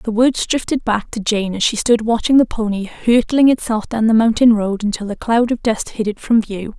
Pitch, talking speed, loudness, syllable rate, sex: 220 Hz, 240 wpm, -16 LUFS, 5.0 syllables/s, female